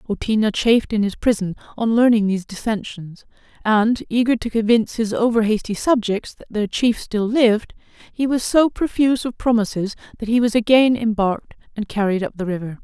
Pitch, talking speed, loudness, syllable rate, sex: 220 Hz, 180 wpm, -19 LUFS, 5.5 syllables/s, female